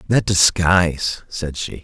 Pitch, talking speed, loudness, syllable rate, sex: 90 Hz, 130 wpm, -17 LUFS, 3.9 syllables/s, male